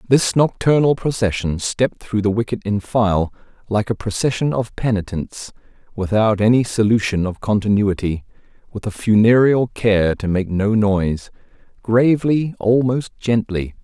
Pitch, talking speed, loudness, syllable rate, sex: 110 Hz, 125 wpm, -18 LUFS, 4.6 syllables/s, male